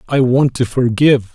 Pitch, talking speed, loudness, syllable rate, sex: 125 Hz, 180 wpm, -14 LUFS, 5.0 syllables/s, male